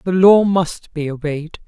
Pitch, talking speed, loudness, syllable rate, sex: 170 Hz, 180 wpm, -16 LUFS, 4.3 syllables/s, female